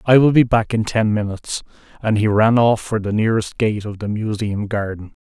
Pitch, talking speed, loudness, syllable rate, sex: 110 Hz, 220 wpm, -18 LUFS, 5.4 syllables/s, male